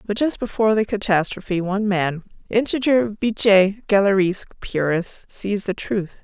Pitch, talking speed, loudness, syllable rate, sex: 200 Hz, 135 wpm, -20 LUFS, 4.8 syllables/s, female